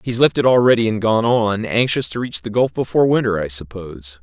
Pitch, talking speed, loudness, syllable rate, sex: 110 Hz, 225 wpm, -17 LUFS, 5.8 syllables/s, male